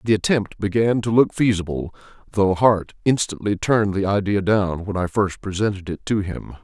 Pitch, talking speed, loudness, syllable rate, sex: 100 Hz, 180 wpm, -21 LUFS, 5.1 syllables/s, male